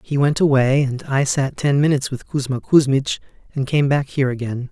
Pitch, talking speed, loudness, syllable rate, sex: 135 Hz, 205 wpm, -19 LUFS, 5.4 syllables/s, male